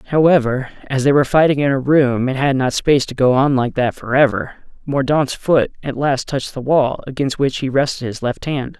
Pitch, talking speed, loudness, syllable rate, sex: 135 Hz, 220 wpm, -17 LUFS, 5.2 syllables/s, male